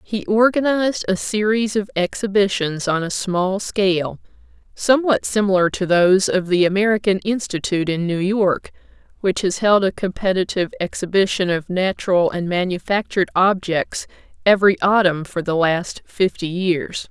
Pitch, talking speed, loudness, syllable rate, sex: 190 Hz, 135 wpm, -19 LUFS, 5.0 syllables/s, female